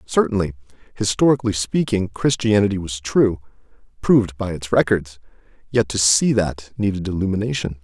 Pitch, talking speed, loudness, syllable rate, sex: 100 Hz, 105 wpm, -20 LUFS, 5.4 syllables/s, male